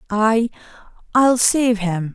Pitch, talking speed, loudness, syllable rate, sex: 225 Hz, 110 wpm, -17 LUFS, 3.1 syllables/s, female